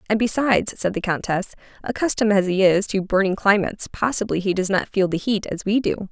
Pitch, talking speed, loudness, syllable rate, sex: 200 Hz, 215 wpm, -21 LUFS, 5.9 syllables/s, female